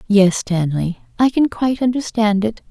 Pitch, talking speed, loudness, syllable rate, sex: 210 Hz, 155 wpm, -18 LUFS, 4.8 syllables/s, female